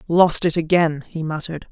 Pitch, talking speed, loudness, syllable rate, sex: 165 Hz, 175 wpm, -19 LUFS, 5.3 syllables/s, female